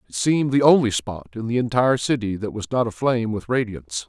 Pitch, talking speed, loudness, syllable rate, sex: 115 Hz, 220 wpm, -21 LUFS, 6.4 syllables/s, male